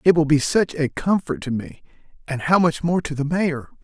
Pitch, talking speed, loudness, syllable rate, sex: 150 Hz, 220 wpm, -21 LUFS, 5.0 syllables/s, male